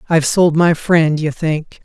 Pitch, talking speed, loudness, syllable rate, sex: 160 Hz, 195 wpm, -14 LUFS, 4.3 syllables/s, male